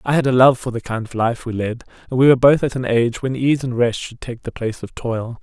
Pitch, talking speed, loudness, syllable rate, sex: 125 Hz, 310 wpm, -18 LUFS, 6.1 syllables/s, male